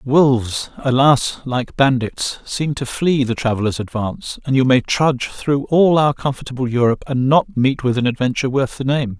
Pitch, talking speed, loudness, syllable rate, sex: 130 Hz, 185 wpm, -18 LUFS, 4.9 syllables/s, male